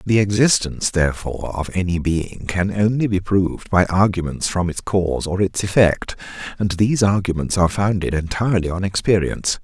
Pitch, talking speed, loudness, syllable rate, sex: 95 Hz, 160 wpm, -19 LUFS, 5.5 syllables/s, male